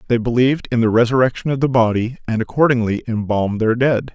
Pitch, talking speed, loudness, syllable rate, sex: 120 Hz, 190 wpm, -17 LUFS, 6.4 syllables/s, male